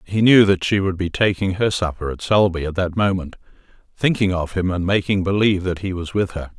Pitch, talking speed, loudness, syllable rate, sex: 95 Hz, 230 wpm, -19 LUFS, 5.7 syllables/s, male